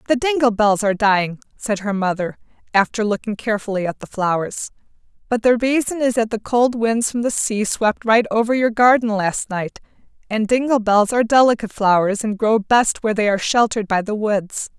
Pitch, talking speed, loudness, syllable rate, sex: 220 Hz, 195 wpm, -18 LUFS, 5.5 syllables/s, female